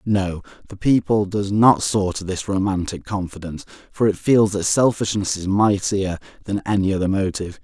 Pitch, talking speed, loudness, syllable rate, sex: 100 Hz, 165 wpm, -20 LUFS, 5.1 syllables/s, male